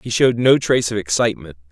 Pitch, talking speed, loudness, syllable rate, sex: 105 Hz, 210 wpm, -17 LUFS, 7.1 syllables/s, male